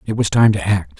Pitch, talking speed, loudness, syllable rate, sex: 100 Hz, 300 wpm, -16 LUFS, 6.0 syllables/s, male